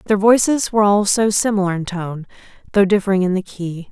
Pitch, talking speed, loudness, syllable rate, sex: 195 Hz, 185 wpm, -17 LUFS, 5.8 syllables/s, female